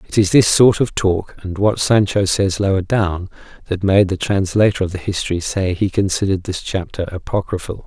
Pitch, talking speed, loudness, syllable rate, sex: 95 Hz, 190 wpm, -17 LUFS, 5.2 syllables/s, male